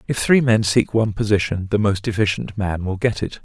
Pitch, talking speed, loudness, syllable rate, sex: 105 Hz, 225 wpm, -19 LUFS, 5.6 syllables/s, male